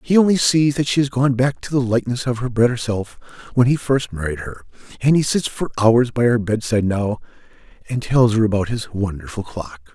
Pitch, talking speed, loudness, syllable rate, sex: 120 Hz, 215 wpm, -19 LUFS, 5.6 syllables/s, male